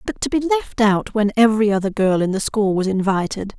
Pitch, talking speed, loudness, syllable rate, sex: 215 Hz, 235 wpm, -18 LUFS, 5.5 syllables/s, female